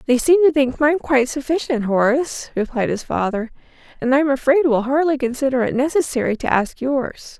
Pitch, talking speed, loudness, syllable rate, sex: 270 Hz, 180 wpm, -18 LUFS, 5.5 syllables/s, female